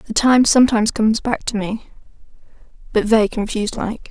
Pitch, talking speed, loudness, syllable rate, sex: 220 Hz, 160 wpm, -17 LUFS, 6.2 syllables/s, female